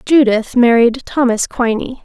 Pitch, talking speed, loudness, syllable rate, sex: 240 Hz, 120 wpm, -13 LUFS, 4.2 syllables/s, female